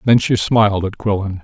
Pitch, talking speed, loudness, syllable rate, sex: 105 Hz, 210 wpm, -16 LUFS, 5.4 syllables/s, male